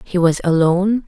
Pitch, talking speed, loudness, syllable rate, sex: 180 Hz, 170 wpm, -16 LUFS, 5.3 syllables/s, female